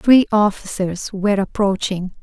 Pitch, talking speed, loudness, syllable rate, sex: 200 Hz, 110 wpm, -18 LUFS, 4.4 syllables/s, female